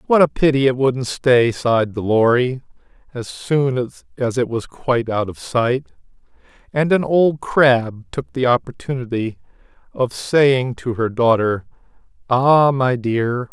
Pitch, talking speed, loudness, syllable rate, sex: 125 Hz, 145 wpm, -18 LUFS, 3.9 syllables/s, male